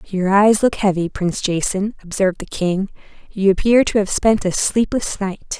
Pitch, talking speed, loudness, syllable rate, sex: 200 Hz, 180 wpm, -18 LUFS, 4.8 syllables/s, female